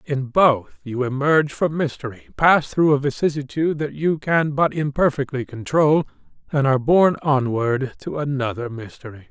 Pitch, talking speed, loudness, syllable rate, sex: 140 Hz, 150 wpm, -20 LUFS, 4.9 syllables/s, male